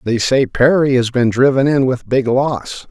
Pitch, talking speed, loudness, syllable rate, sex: 130 Hz, 205 wpm, -14 LUFS, 4.3 syllables/s, male